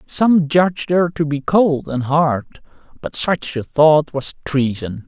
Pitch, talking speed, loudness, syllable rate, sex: 150 Hz, 165 wpm, -17 LUFS, 3.8 syllables/s, male